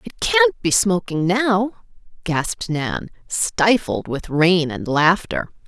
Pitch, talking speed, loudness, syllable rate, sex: 195 Hz, 125 wpm, -19 LUFS, 3.3 syllables/s, female